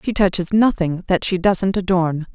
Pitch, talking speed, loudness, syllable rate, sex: 185 Hz, 180 wpm, -18 LUFS, 4.6 syllables/s, female